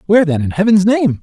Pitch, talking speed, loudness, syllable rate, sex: 185 Hz, 245 wpm, -13 LUFS, 6.5 syllables/s, male